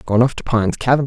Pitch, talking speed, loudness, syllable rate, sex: 120 Hz, 280 wpm, -18 LUFS, 7.0 syllables/s, male